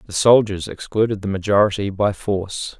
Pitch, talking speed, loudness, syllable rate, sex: 100 Hz, 150 wpm, -19 LUFS, 5.3 syllables/s, male